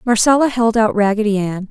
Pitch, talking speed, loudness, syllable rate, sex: 220 Hz, 175 wpm, -15 LUFS, 5.6 syllables/s, female